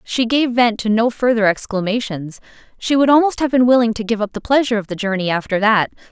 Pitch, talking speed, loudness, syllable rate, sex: 225 Hz, 225 wpm, -16 LUFS, 6.0 syllables/s, female